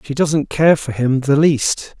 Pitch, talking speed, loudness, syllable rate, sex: 145 Hz, 210 wpm, -16 LUFS, 3.7 syllables/s, male